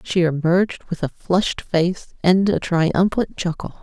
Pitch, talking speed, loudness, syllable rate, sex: 170 Hz, 155 wpm, -20 LUFS, 4.4 syllables/s, female